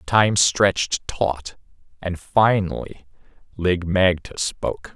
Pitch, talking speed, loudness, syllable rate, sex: 90 Hz, 95 wpm, -21 LUFS, 3.3 syllables/s, male